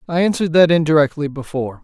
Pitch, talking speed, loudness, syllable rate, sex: 155 Hz, 165 wpm, -16 LUFS, 7.2 syllables/s, male